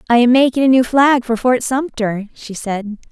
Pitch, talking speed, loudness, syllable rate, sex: 245 Hz, 210 wpm, -15 LUFS, 4.8 syllables/s, female